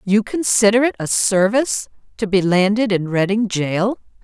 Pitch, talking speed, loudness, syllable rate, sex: 205 Hz, 155 wpm, -17 LUFS, 4.7 syllables/s, female